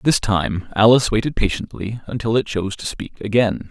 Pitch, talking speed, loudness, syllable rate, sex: 110 Hz, 180 wpm, -19 LUFS, 5.3 syllables/s, male